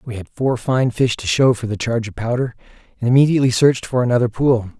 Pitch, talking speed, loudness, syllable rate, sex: 120 Hz, 225 wpm, -18 LUFS, 6.6 syllables/s, male